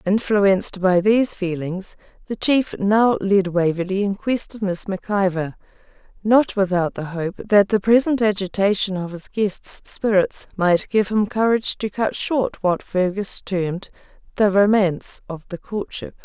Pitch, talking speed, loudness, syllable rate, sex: 195 Hz, 155 wpm, -20 LUFS, 4.3 syllables/s, female